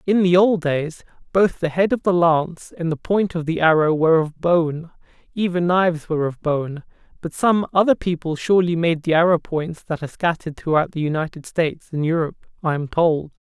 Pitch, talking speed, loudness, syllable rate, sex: 165 Hz, 200 wpm, -20 LUFS, 5.5 syllables/s, male